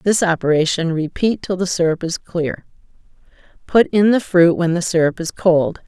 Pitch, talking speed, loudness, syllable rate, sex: 175 Hz, 165 wpm, -17 LUFS, 4.8 syllables/s, female